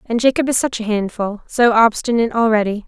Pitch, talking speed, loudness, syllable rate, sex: 225 Hz, 190 wpm, -17 LUFS, 5.9 syllables/s, female